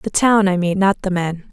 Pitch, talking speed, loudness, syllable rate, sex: 190 Hz, 275 wpm, -17 LUFS, 4.9 syllables/s, female